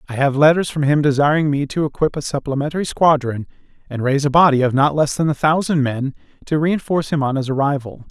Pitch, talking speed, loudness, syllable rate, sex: 145 Hz, 215 wpm, -17 LUFS, 6.3 syllables/s, male